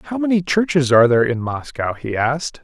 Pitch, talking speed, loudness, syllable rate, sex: 145 Hz, 205 wpm, -18 LUFS, 5.8 syllables/s, male